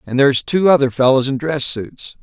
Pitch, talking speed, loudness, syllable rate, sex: 135 Hz, 215 wpm, -15 LUFS, 5.3 syllables/s, male